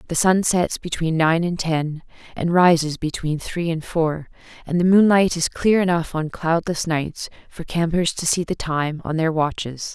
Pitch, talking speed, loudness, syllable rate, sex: 165 Hz, 185 wpm, -20 LUFS, 4.4 syllables/s, female